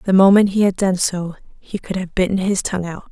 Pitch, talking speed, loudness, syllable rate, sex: 190 Hz, 250 wpm, -17 LUFS, 5.9 syllables/s, female